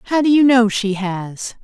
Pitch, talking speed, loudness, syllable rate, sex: 230 Hz, 220 wpm, -16 LUFS, 4.4 syllables/s, female